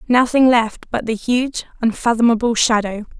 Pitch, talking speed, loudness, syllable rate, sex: 230 Hz, 130 wpm, -17 LUFS, 4.8 syllables/s, female